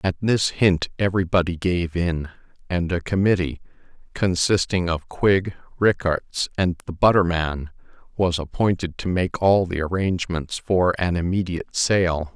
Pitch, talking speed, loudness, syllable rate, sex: 90 Hz, 135 wpm, -22 LUFS, 4.4 syllables/s, male